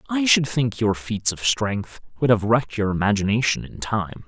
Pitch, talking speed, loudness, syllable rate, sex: 115 Hz, 195 wpm, -21 LUFS, 4.9 syllables/s, male